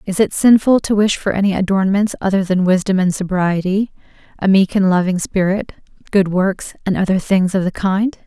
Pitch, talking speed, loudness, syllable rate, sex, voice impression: 195 Hz, 190 wpm, -16 LUFS, 5.1 syllables/s, female, very feminine, slightly young, slightly adult-like, thin, relaxed, weak, slightly bright, very soft, clear, very fluent, slightly raspy, very cute, intellectual, refreshing, very sincere, very calm, very friendly, very reassuring, very unique, very elegant, very sweet, very kind, very modest, light